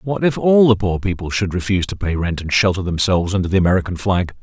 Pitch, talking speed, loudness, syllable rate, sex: 95 Hz, 245 wpm, -17 LUFS, 6.5 syllables/s, male